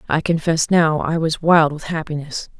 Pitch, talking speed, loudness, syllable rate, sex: 160 Hz, 185 wpm, -18 LUFS, 4.7 syllables/s, female